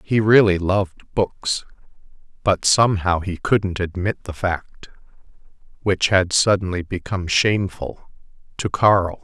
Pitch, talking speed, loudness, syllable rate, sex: 95 Hz, 115 wpm, -19 LUFS, 4.2 syllables/s, male